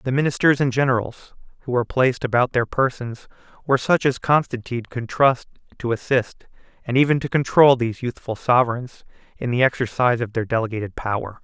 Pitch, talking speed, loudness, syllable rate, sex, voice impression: 125 Hz, 170 wpm, -20 LUFS, 6.0 syllables/s, male, very masculine, middle-aged, thick, slightly tensed, slightly powerful, slightly dark, slightly soft, slightly muffled, slightly fluent, slightly raspy, cool, very intellectual, refreshing, sincere, calm, friendly, reassuring, slightly unique, slightly elegant, slightly wild, sweet, lively, kind, slightly modest